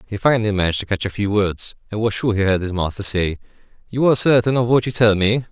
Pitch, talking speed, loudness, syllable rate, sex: 105 Hz, 260 wpm, -19 LUFS, 6.6 syllables/s, male